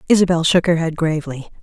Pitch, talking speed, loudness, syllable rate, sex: 165 Hz, 185 wpm, -17 LUFS, 6.8 syllables/s, female